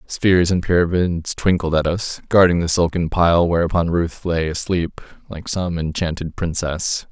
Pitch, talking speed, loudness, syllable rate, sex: 85 Hz, 145 wpm, -19 LUFS, 4.4 syllables/s, male